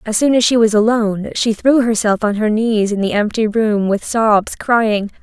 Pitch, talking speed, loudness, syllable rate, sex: 220 Hz, 220 wpm, -15 LUFS, 4.7 syllables/s, female